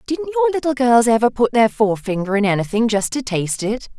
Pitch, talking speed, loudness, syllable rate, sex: 240 Hz, 210 wpm, -18 LUFS, 5.9 syllables/s, female